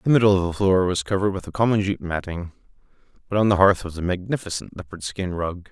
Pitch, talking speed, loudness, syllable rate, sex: 95 Hz, 230 wpm, -22 LUFS, 6.4 syllables/s, male